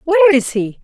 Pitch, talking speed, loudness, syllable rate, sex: 290 Hz, 215 wpm, -13 LUFS, 7.1 syllables/s, female